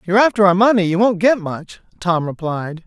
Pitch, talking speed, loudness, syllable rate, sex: 190 Hz, 230 wpm, -16 LUFS, 5.6 syllables/s, male